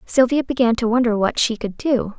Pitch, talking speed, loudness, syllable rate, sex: 240 Hz, 220 wpm, -19 LUFS, 5.3 syllables/s, female